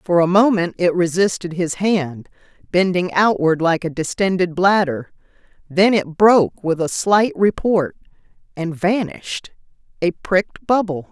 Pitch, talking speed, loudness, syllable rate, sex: 180 Hz, 130 wpm, -18 LUFS, 4.3 syllables/s, female